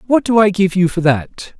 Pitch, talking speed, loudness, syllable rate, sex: 185 Hz, 265 wpm, -14 LUFS, 5.0 syllables/s, male